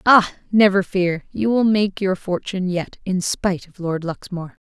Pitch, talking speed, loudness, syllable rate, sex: 190 Hz, 180 wpm, -20 LUFS, 4.8 syllables/s, female